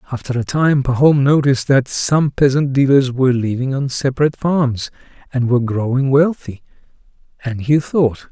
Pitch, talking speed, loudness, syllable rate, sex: 135 Hz, 150 wpm, -16 LUFS, 5.1 syllables/s, male